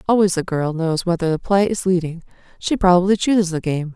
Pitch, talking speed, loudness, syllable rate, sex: 180 Hz, 215 wpm, -18 LUFS, 5.8 syllables/s, female